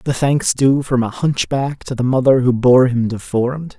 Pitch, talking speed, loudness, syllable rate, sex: 130 Hz, 205 wpm, -16 LUFS, 4.5 syllables/s, male